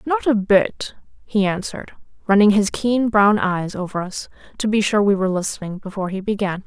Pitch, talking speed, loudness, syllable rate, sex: 205 Hz, 190 wpm, -19 LUFS, 5.4 syllables/s, female